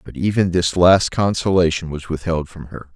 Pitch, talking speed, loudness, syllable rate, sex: 85 Hz, 185 wpm, -18 LUFS, 5.0 syllables/s, male